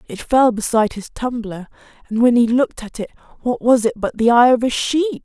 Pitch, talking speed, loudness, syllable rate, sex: 235 Hz, 230 wpm, -17 LUFS, 5.9 syllables/s, female